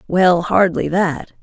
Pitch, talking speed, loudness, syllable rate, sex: 175 Hz, 125 wpm, -16 LUFS, 3.3 syllables/s, female